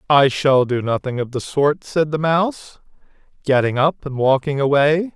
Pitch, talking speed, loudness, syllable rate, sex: 145 Hz, 175 wpm, -18 LUFS, 4.6 syllables/s, male